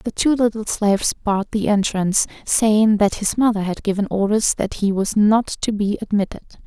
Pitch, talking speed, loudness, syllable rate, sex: 210 Hz, 190 wpm, -19 LUFS, 5.1 syllables/s, female